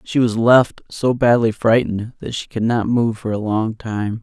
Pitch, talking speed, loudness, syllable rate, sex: 115 Hz, 215 wpm, -18 LUFS, 4.5 syllables/s, male